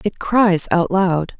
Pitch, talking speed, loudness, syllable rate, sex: 180 Hz, 170 wpm, -17 LUFS, 4.0 syllables/s, female